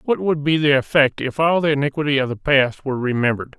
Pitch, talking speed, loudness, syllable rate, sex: 140 Hz, 235 wpm, -18 LUFS, 6.3 syllables/s, male